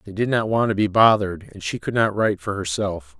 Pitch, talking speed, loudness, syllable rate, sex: 105 Hz, 265 wpm, -21 LUFS, 6.0 syllables/s, male